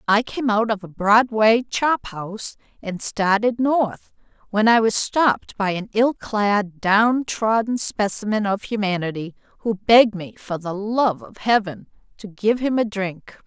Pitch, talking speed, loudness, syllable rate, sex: 210 Hz, 165 wpm, -20 LUFS, 4.1 syllables/s, female